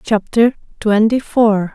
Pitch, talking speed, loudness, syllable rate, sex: 220 Hz, 105 wpm, -15 LUFS, 3.5 syllables/s, female